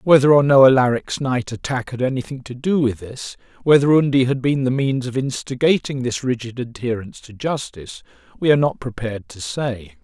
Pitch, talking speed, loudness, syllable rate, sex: 125 Hz, 185 wpm, -19 LUFS, 5.5 syllables/s, male